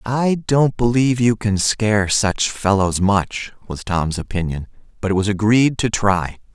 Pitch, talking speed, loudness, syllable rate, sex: 105 Hz, 165 wpm, -18 LUFS, 4.3 syllables/s, male